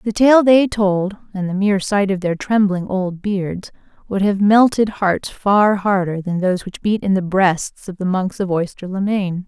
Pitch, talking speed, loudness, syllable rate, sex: 195 Hz, 210 wpm, -17 LUFS, 4.4 syllables/s, female